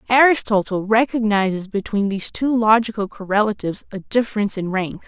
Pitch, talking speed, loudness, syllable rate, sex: 210 Hz, 130 wpm, -19 LUFS, 5.8 syllables/s, female